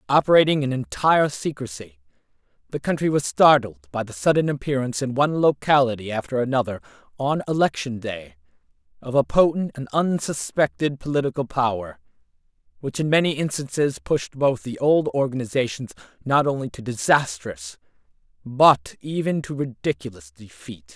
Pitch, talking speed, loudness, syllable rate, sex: 140 Hz, 130 wpm, -22 LUFS, 5.3 syllables/s, male